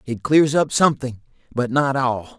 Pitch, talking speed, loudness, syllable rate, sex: 130 Hz, 175 wpm, -19 LUFS, 4.6 syllables/s, male